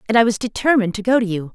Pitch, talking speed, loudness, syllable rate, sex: 220 Hz, 310 wpm, -18 LUFS, 8.0 syllables/s, female